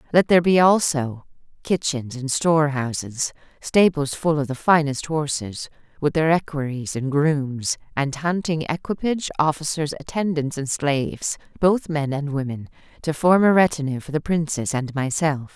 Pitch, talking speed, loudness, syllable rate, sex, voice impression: 150 Hz, 145 wpm, -22 LUFS, 4.7 syllables/s, female, feminine, very adult-like, slightly intellectual, calm, slightly sweet